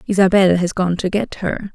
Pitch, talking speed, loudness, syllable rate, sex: 190 Hz, 205 wpm, -17 LUFS, 5.0 syllables/s, female